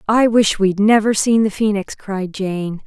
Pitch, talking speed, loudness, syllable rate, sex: 205 Hz, 190 wpm, -16 LUFS, 4.1 syllables/s, female